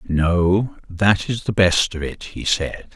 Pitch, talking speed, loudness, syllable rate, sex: 95 Hz, 160 wpm, -20 LUFS, 3.4 syllables/s, male